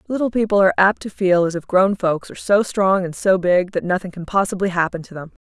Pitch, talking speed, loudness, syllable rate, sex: 190 Hz, 255 wpm, -18 LUFS, 6.0 syllables/s, female